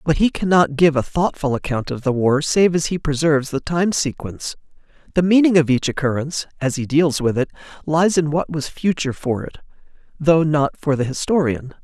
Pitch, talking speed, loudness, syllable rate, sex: 150 Hz, 200 wpm, -19 LUFS, 5.4 syllables/s, male